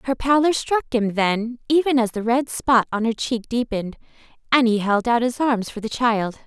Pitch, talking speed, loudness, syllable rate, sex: 235 Hz, 215 wpm, -20 LUFS, 4.9 syllables/s, female